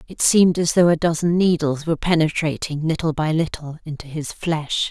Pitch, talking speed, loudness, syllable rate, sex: 160 Hz, 185 wpm, -20 LUFS, 5.3 syllables/s, female